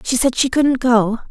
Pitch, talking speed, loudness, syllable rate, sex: 250 Hz, 230 wpm, -16 LUFS, 4.6 syllables/s, female